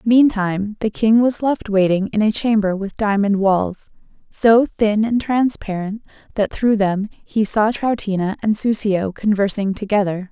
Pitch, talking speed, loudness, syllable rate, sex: 210 Hz, 150 wpm, -18 LUFS, 4.3 syllables/s, female